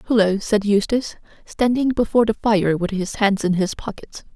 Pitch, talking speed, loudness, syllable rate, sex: 210 Hz, 180 wpm, -19 LUFS, 5.2 syllables/s, female